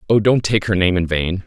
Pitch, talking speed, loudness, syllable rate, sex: 95 Hz, 285 wpm, -17 LUFS, 5.4 syllables/s, male